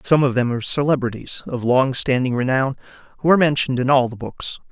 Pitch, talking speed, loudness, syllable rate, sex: 130 Hz, 190 wpm, -19 LUFS, 6.2 syllables/s, male